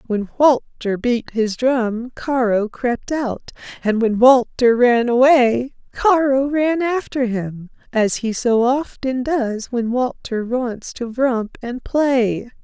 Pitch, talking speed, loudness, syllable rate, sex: 245 Hz, 140 wpm, -18 LUFS, 3.4 syllables/s, female